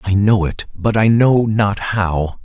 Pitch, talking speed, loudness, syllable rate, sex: 100 Hz, 195 wpm, -16 LUFS, 3.6 syllables/s, male